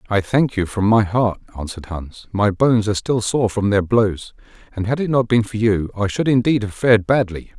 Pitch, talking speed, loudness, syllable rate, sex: 110 Hz, 230 wpm, -18 LUFS, 5.4 syllables/s, male